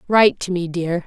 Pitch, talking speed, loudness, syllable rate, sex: 180 Hz, 225 wpm, -19 LUFS, 5.5 syllables/s, female